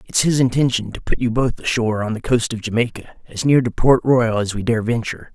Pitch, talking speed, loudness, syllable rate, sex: 120 Hz, 235 wpm, -19 LUFS, 5.6 syllables/s, male